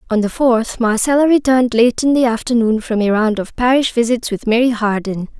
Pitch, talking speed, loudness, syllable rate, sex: 235 Hz, 200 wpm, -15 LUFS, 5.5 syllables/s, female